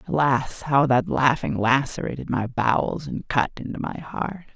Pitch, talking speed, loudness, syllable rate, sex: 135 Hz, 160 wpm, -23 LUFS, 4.5 syllables/s, male